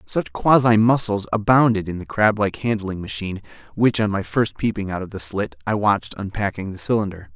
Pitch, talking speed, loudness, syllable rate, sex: 105 Hz, 190 wpm, -21 LUFS, 5.7 syllables/s, male